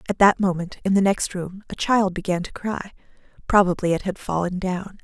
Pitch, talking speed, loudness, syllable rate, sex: 190 Hz, 205 wpm, -22 LUFS, 5.3 syllables/s, female